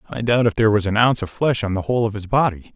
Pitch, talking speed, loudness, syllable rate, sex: 110 Hz, 325 wpm, -19 LUFS, 7.4 syllables/s, male